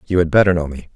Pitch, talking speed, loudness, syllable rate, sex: 85 Hz, 315 wpm, -16 LUFS, 7.5 syllables/s, male